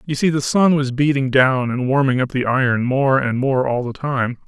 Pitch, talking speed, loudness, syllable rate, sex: 135 Hz, 240 wpm, -18 LUFS, 4.9 syllables/s, male